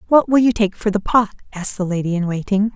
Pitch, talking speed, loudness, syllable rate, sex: 205 Hz, 260 wpm, -18 LUFS, 6.3 syllables/s, female